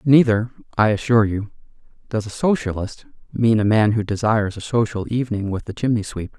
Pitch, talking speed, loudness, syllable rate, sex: 110 Hz, 180 wpm, -20 LUFS, 5.7 syllables/s, male